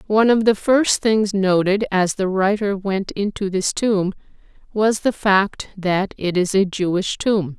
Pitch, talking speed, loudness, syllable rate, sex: 200 Hz, 175 wpm, -19 LUFS, 4.1 syllables/s, female